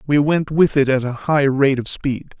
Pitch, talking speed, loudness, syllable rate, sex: 140 Hz, 250 wpm, -17 LUFS, 4.7 syllables/s, male